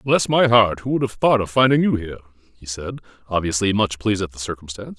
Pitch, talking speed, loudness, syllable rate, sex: 105 Hz, 230 wpm, -19 LUFS, 6.5 syllables/s, male